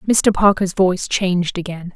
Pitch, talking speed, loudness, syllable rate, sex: 185 Hz, 155 wpm, -17 LUFS, 4.7 syllables/s, female